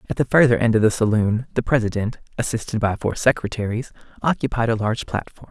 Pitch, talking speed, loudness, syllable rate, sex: 115 Hz, 185 wpm, -21 LUFS, 6.3 syllables/s, male